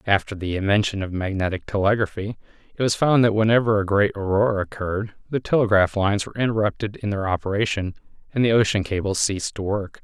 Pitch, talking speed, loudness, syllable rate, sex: 105 Hz, 180 wpm, -22 LUFS, 6.4 syllables/s, male